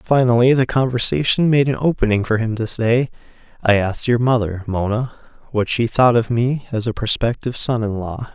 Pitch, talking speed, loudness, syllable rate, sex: 120 Hz, 185 wpm, -18 LUFS, 5.3 syllables/s, male